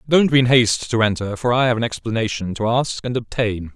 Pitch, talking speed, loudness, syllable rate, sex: 115 Hz, 240 wpm, -19 LUFS, 5.9 syllables/s, male